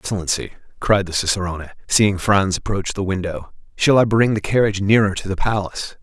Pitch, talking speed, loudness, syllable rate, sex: 100 Hz, 180 wpm, -19 LUFS, 5.9 syllables/s, male